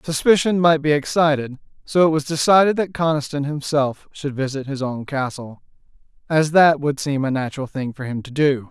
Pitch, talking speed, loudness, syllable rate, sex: 145 Hz, 185 wpm, -19 LUFS, 5.3 syllables/s, male